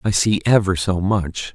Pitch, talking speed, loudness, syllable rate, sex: 95 Hz, 195 wpm, -18 LUFS, 4.1 syllables/s, male